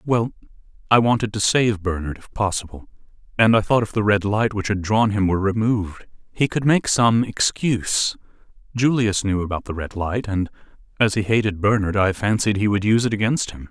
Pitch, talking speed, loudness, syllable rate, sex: 105 Hz, 195 wpm, -20 LUFS, 5.4 syllables/s, male